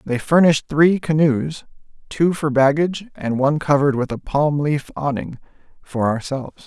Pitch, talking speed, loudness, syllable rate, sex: 145 Hz, 155 wpm, -19 LUFS, 5.0 syllables/s, male